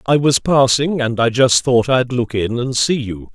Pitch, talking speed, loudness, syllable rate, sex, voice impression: 125 Hz, 235 wpm, -15 LUFS, 4.4 syllables/s, male, masculine, adult-like, slightly thin, tensed, powerful, slightly bright, clear, fluent, cool, intellectual, friendly, wild, lively